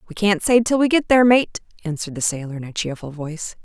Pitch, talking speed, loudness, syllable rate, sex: 190 Hz, 245 wpm, -19 LUFS, 6.6 syllables/s, female